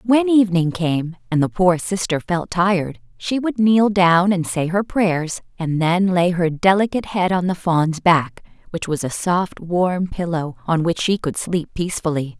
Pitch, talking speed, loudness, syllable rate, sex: 180 Hz, 190 wpm, -19 LUFS, 4.4 syllables/s, female